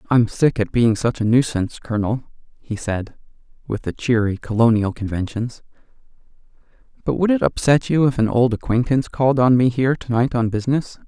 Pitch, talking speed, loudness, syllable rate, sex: 120 Hz, 170 wpm, -19 LUFS, 5.7 syllables/s, male